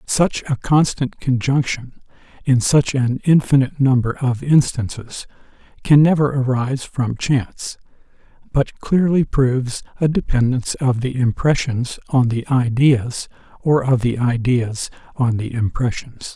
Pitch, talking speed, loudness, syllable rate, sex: 130 Hz, 125 wpm, -18 LUFS, 4.3 syllables/s, male